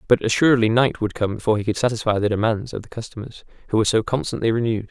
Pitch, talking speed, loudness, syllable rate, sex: 110 Hz, 230 wpm, -20 LUFS, 7.6 syllables/s, male